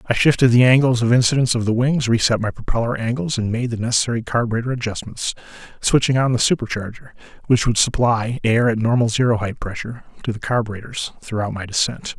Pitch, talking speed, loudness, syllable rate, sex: 115 Hz, 190 wpm, -19 LUFS, 6.4 syllables/s, male